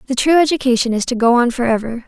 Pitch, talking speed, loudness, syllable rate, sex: 250 Hz, 230 wpm, -15 LUFS, 6.9 syllables/s, female